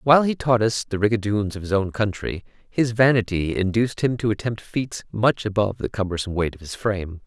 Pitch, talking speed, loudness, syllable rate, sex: 105 Hz, 205 wpm, -22 LUFS, 5.6 syllables/s, male